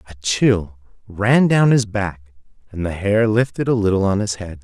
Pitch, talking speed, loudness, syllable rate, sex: 100 Hz, 195 wpm, -18 LUFS, 4.5 syllables/s, male